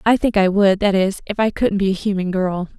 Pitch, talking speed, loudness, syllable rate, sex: 195 Hz, 260 wpm, -18 LUFS, 5.5 syllables/s, female